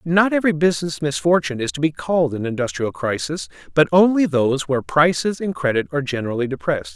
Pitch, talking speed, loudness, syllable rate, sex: 140 Hz, 180 wpm, -19 LUFS, 6.6 syllables/s, male